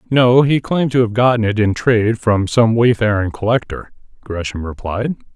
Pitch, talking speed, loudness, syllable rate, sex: 115 Hz, 170 wpm, -16 LUFS, 5.1 syllables/s, male